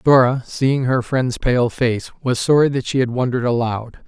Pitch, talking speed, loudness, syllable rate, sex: 125 Hz, 190 wpm, -18 LUFS, 4.7 syllables/s, male